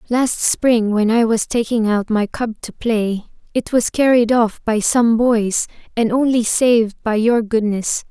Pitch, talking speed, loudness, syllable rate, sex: 225 Hz, 180 wpm, -17 LUFS, 4.0 syllables/s, female